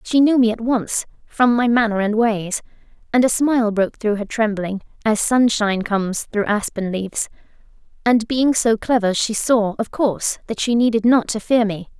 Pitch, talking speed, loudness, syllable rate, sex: 220 Hz, 190 wpm, -19 LUFS, 5.0 syllables/s, female